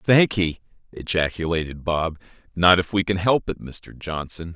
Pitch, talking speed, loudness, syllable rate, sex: 85 Hz, 160 wpm, -22 LUFS, 4.8 syllables/s, male